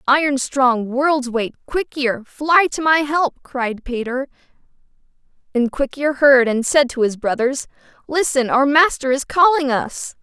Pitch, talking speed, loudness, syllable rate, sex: 270 Hz, 160 wpm, -18 LUFS, 4.1 syllables/s, female